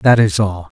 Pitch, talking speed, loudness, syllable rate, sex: 100 Hz, 225 wpm, -15 LUFS, 4.4 syllables/s, male